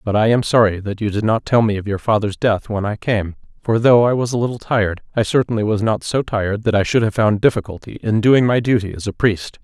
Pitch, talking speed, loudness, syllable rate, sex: 110 Hz, 260 wpm, -17 LUFS, 6.0 syllables/s, male